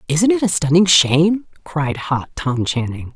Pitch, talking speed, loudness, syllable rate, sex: 160 Hz, 170 wpm, -17 LUFS, 4.4 syllables/s, female